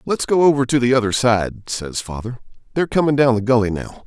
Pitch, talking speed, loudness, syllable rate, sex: 125 Hz, 220 wpm, -18 LUFS, 6.0 syllables/s, male